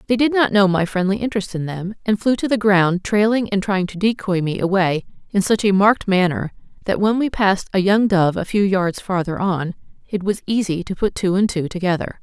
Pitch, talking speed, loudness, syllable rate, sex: 195 Hz, 230 wpm, -19 LUFS, 5.5 syllables/s, female